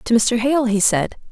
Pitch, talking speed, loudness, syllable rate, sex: 230 Hz, 230 wpm, -17 LUFS, 4.6 syllables/s, female